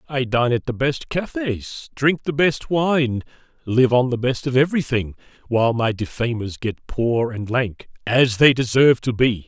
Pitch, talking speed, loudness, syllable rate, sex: 125 Hz, 175 wpm, -20 LUFS, 4.5 syllables/s, male